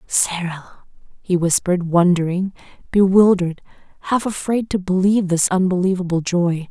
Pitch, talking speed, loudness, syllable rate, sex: 180 Hz, 105 wpm, -18 LUFS, 5.0 syllables/s, female